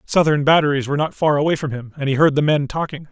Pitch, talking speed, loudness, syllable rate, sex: 145 Hz, 270 wpm, -18 LUFS, 6.8 syllables/s, male